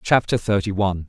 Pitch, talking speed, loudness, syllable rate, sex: 100 Hz, 165 wpm, -21 LUFS, 6.2 syllables/s, male